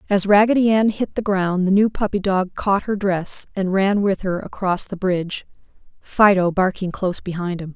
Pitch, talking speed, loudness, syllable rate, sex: 190 Hz, 195 wpm, -19 LUFS, 4.9 syllables/s, female